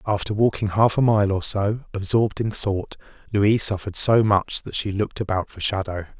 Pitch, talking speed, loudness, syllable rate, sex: 100 Hz, 195 wpm, -21 LUFS, 5.4 syllables/s, male